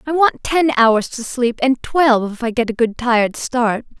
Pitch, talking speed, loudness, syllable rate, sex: 250 Hz, 225 wpm, -17 LUFS, 4.6 syllables/s, female